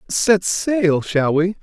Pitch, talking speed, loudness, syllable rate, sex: 185 Hz, 150 wpm, -17 LUFS, 2.9 syllables/s, male